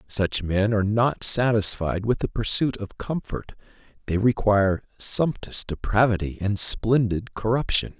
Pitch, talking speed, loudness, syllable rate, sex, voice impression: 105 Hz, 130 wpm, -23 LUFS, 4.3 syllables/s, male, very masculine, very middle-aged, very thick, slightly tensed, very powerful, bright, soft, muffled, fluent, slightly raspy, very cool, intellectual, refreshing, slightly sincere, calm, mature, very friendly, very reassuring, very unique, slightly elegant, wild, sweet, lively, kind, slightly modest